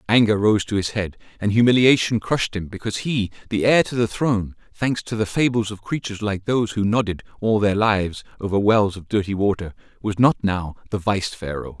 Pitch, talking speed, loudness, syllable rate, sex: 105 Hz, 205 wpm, -21 LUFS, 5.6 syllables/s, male